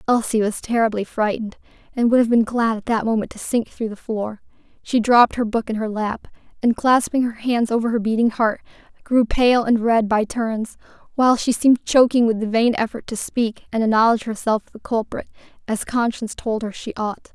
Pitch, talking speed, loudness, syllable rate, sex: 225 Hz, 205 wpm, -20 LUFS, 5.5 syllables/s, female